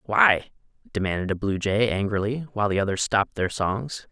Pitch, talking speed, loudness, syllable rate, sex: 105 Hz, 175 wpm, -24 LUFS, 5.4 syllables/s, male